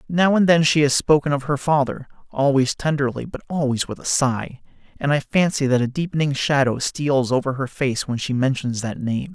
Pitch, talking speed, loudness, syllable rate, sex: 140 Hz, 205 wpm, -20 LUFS, 5.2 syllables/s, male